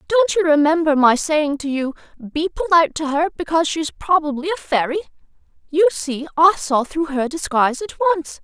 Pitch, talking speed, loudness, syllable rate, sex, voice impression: 315 Hz, 180 wpm, -18 LUFS, 5.6 syllables/s, female, very feminine, slightly young, thin, very tensed, powerful, bright, very hard, very clear, fluent, slightly raspy, very cool, intellectual, very refreshing, very sincere, calm, friendly, reassuring, very unique, slightly elegant, wild, sweet, lively, strict, slightly intense